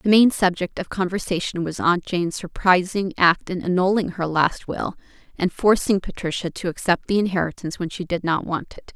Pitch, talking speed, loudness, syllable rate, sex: 180 Hz, 190 wpm, -22 LUFS, 5.3 syllables/s, female